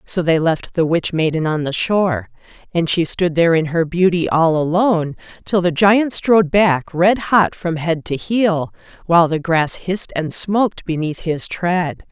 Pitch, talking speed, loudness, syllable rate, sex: 170 Hz, 190 wpm, -17 LUFS, 4.5 syllables/s, female